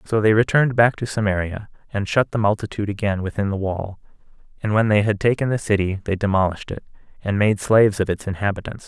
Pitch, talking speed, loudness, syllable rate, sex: 105 Hz, 205 wpm, -20 LUFS, 6.3 syllables/s, male